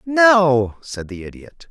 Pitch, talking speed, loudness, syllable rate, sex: 150 Hz, 140 wpm, -15 LUFS, 3.2 syllables/s, male